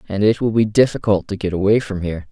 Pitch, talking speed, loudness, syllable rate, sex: 100 Hz, 260 wpm, -18 LUFS, 6.5 syllables/s, male